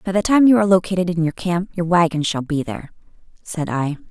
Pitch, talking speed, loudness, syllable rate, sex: 175 Hz, 235 wpm, -18 LUFS, 6.2 syllables/s, female